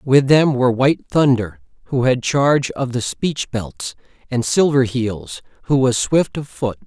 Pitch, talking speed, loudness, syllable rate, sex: 130 Hz, 190 wpm, -18 LUFS, 4.3 syllables/s, male